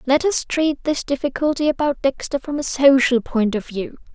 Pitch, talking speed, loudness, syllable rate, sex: 275 Hz, 190 wpm, -19 LUFS, 4.9 syllables/s, female